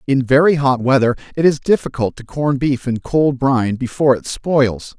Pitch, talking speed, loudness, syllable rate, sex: 135 Hz, 195 wpm, -16 LUFS, 5.0 syllables/s, male